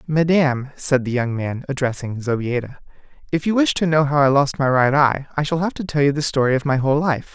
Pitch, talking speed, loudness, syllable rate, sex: 140 Hz, 245 wpm, -19 LUFS, 5.7 syllables/s, male